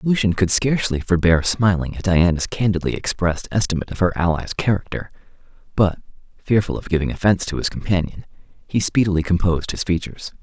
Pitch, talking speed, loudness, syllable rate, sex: 90 Hz, 155 wpm, -20 LUFS, 6.3 syllables/s, male